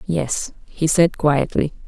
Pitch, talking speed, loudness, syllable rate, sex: 155 Hz, 130 wpm, -19 LUFS, 3.3 syllables/s, female